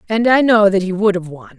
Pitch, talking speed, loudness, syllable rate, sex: 200 Hz, 300 wpm, -14 LUFS, 5.7 syllables/s, female